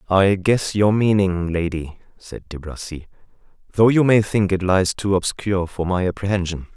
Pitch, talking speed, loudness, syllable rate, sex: 95 Hz, 170 wpm, -19 LUFS, 4.8 syllables/s, male